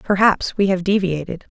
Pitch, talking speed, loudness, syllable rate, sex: 190 Hz, 155 wpm, -18 LUFS, 5.0 syllables/s, female